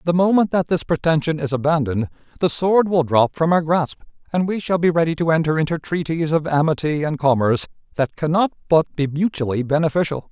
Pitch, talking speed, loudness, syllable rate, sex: 160 Hz, 200 wpm, -19 LUFS, 5.8 syllables/s, male